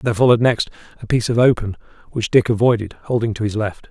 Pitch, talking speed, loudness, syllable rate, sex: 110 Hz, 215 wpm, -18 LUFS, 7.0 syllables/s, male